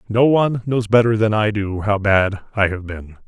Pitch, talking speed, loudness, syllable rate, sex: 105 Hz, 220 wpm, -18 LUFS, 4.9 syllables/s, male